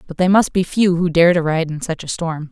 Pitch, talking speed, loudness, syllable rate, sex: 170 Hz, 310 wpm, -17 LUFS, 5.5 syllables/s, female